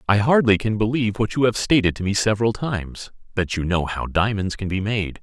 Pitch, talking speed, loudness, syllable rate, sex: 105 Hz, 220 wpm, -21 LUFS, 5.8 syllables/s, male